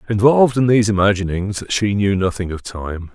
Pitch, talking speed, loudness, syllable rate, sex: 100 Hz, 170 wpm, -17 LUFS, 5.5 syllables/s, male